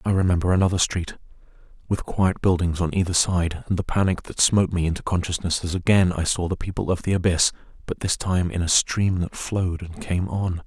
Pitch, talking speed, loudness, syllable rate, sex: 90 Hz, 215 wpm, -23 LUFS, 5.7 syllables/s, male